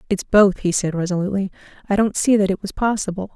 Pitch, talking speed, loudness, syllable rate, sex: 195 Hz, 215 wpm, -19 LUFS, 6.5 syllables/s, female